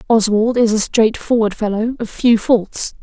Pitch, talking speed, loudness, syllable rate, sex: 220 Hz, 160 wpm, -16 LUFS, 4.4 syllables/s, female